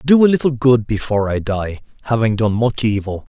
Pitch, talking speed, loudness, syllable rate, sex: 115 Hz, 215 wpm, -17 LUFS, 5.7 syllables/s, male